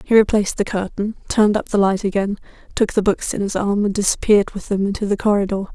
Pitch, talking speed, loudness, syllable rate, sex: 200 Hz, 230 wpm, -19 LUFS, 6.4 syllables/s, female